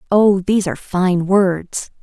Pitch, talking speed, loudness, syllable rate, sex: 190 Hz, 150 wpm, -16 LUFS, 4.1 syllables/s, female